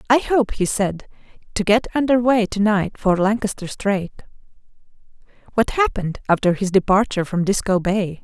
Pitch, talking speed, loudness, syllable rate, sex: 205 Hz, 155 wpm, -19 LUFS, 5.0 syllables/s, female